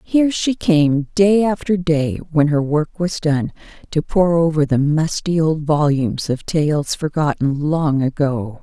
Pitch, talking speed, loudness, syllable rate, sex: 155 Hz, 160 wpm, -18 LUFS, 4.0 syllables/s, female